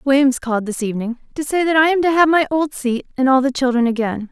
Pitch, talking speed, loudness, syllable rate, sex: 270 Hz, 265 wpm, -17 LUFS, 6.3 syllables/s, female